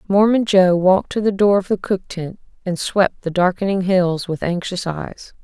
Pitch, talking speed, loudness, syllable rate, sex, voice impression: 185 Hz, 200 wpm, -18 LUFS, 4.7 syllables/s, female, feminine, adult-like, slightly relaxed, weak, soft, slightly muffled, calm, slightly friendly, reassuring, kind, slightly modest